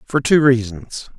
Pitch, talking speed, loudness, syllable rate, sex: 125 Hz, 150 wpm, -15 LUFS, 3.9 syllables/s, male